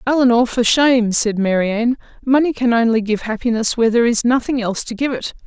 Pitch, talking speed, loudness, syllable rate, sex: 235 Hz, 195 wpm, -16 LUFS, 6.2 syllables/s, female